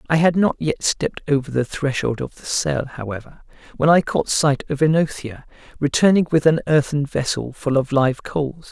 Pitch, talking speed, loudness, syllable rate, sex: 145 Hz, 185 wpm, -20 LUFS, 5.1 syllables/s, male